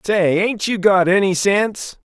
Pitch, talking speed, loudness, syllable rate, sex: 195 Hz, 170 wpm, -16 LUFS, 4.3 syllables/s, male